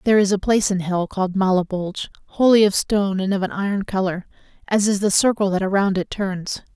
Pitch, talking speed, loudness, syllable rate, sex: 195 Hz, 215 wpm, -20 LUFS, 6.1 syllables/s, female